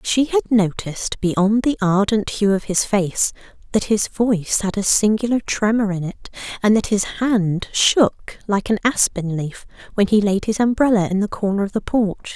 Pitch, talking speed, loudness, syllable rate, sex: 210 Hz, 190 wpm, -19 LUFS, 4.6 syllables/s, female